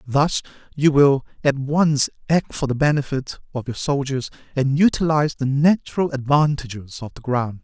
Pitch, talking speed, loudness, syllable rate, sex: 140 Hz, 155 wpm, -20 LUFS, 4.9 syllables/s, male